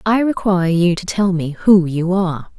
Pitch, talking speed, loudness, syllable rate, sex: 180 Hz, 210 wpm, -16 LUFS, 5.0 syllables/s, female